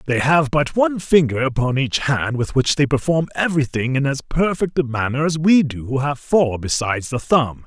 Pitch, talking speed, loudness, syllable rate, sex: 140 Hz, 210 wpm, -19 LUFS, 5.1 syllables/s, male